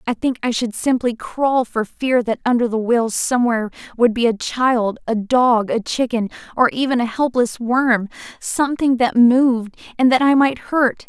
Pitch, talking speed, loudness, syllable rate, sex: 240 Hz, 180 wpm, -18 LUFS, 4.6 syllables/s, female